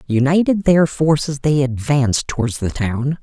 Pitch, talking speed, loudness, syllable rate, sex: 140 Hz, 150 wpm, -17 LUFS, 4.6 syllables/s, male